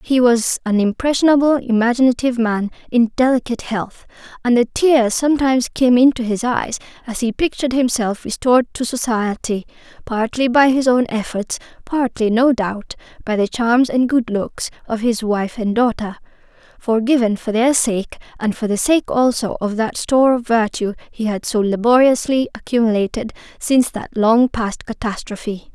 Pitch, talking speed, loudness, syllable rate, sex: 235 Hz, 150 wpm, -17 LUFS, 5.0 syllables/s, female